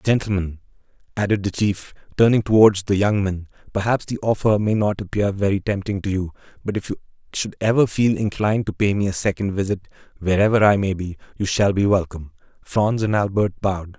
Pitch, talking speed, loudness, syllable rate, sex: 100 Hz, 190 wpm, -20 LUFS, 5.7 syllables/s, male